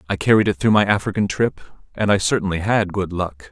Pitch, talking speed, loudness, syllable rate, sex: 95 Hz, 220 wpm, -19 LUFS, 6.0 syllables/s, male